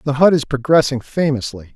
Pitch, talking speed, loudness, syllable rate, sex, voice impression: 140 Hz, 170 wpm, -16 LUFS, 5.8 syllables/s, male, very masculine, very adult-like, middle-aged, thick, tensed, slightly powerful, slightly bright, slightly soft, slightly clear, fluent, raspy, very cool, intellectual, slightly refreshing, sincere, calm, slightly mature, friendly, reassuring, slightly unique, elegant, slightly sweet, slightly lively, kind